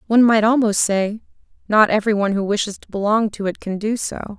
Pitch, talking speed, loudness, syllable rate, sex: 210 Hz, 220 wpm, -18 LUFS, 6.2 syllables/s, female